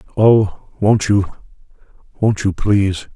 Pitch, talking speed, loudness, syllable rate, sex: 100 Hz, 95 wpm, -16 LUFS, 3.7 syllables/s, male